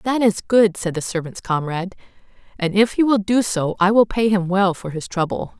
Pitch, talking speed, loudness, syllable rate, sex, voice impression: 195 Hz, 225 wpm, -19 LUFS, 5.1 syllables/s, female, feminine, slightly gender-neutral, slightly young, slightly adult-like, thin, tensed, slightly powerful, bright, slightly soft, very clear, fluent, cute, intellectual, slightly refreshing, sincere, slightly calm, very friendly, reassuring, unique, slightly sweet, very lively, kind